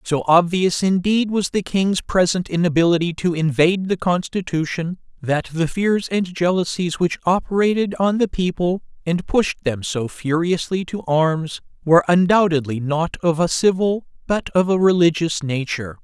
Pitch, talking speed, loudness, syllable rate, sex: 175 Hz, 150 wpm, -19 LUFS, 4.7 syllables/s, male